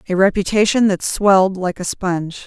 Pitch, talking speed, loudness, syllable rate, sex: 190 Hz, 170 wpm, -16 LUFS, 5.2 syllables/s, female